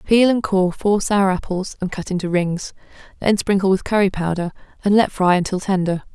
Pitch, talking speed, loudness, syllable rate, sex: 190 Hz, 195 wpm, -19 LUFS, 5.3 syllables/s, female